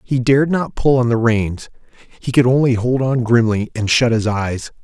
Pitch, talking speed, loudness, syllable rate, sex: 120 Hz, 210 wpm, -16 LUFS, 4.7 syllables/s, male